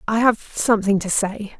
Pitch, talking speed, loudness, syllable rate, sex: 210 Hz, 190 wpm, -20 LUFS, 5.2 syllables/s, female